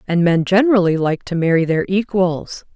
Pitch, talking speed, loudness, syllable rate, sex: 180 Hz, 175 wpm, -16 LUFS, 5.2 syllables/s, female